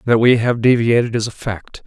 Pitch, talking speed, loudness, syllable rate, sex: 115 Hz, 225 wpm, -16 LUFS, 5.2 syllables/s, male